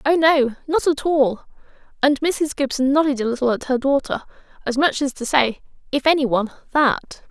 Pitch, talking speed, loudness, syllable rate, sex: 275 Hz, 180 wpm, -20 LUFS, 5.2 syllables/s, female